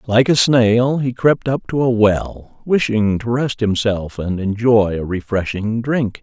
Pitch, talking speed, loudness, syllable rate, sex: 115 Hz, 175 wpm, -17 LUFS, 3.8 syllables/s, male